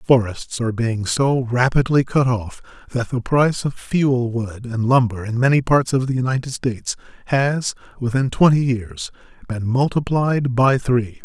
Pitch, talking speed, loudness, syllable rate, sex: 125 Hz, 160 wpm, -19 LUFS, 4.5 syllables/s, male